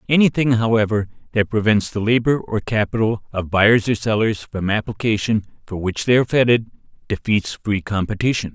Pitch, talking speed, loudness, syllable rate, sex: 110 Hz, 155 wpm, -19 LUFS, 5.4 syllables/s, male